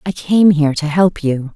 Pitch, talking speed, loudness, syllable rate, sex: 165 Hz, 230 wpm, -14 LUFS, 4.8 syllables/s, female